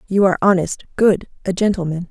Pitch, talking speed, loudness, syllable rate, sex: 190 Hz, 170 wpm, -18 LUFS, 6.0 syllables/s, female